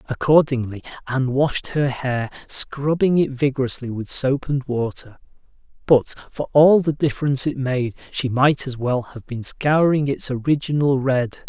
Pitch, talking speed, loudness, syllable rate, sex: 135 Hz, 150 wpm, -20 LUFS, 4.6 syllables/s, male